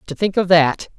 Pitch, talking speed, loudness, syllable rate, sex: 175 Hz, 245 wpm, -16 LUFS, 5.1 syllables/s, female